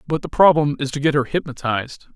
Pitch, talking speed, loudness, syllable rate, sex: 145 Hz, 220 wpm, -19 LUFS, 6.2 syllables/s, male